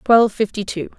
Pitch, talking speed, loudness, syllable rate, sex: 210 Hz, 185 wpm, -18 LUFS, 6.0 syllables/s, female